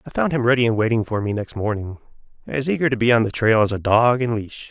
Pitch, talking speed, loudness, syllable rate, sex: 115 Hz, 280 wpm, -20 LUFS, 6.3 syllables/s, male